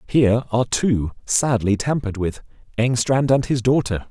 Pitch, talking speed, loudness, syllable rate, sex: 120 Hz, 145 wpm, -20 LUFS, 5.1 syllables/s, male